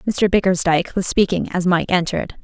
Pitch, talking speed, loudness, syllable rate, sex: 185 Hz, 175 wpm, -18 LUFS, 5.9 syllables/s, female